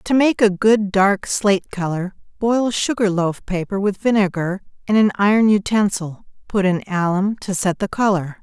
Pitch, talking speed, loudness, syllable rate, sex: 200 Hz, 165 wpm, -18 LUFS, 4.6 syllables/s, female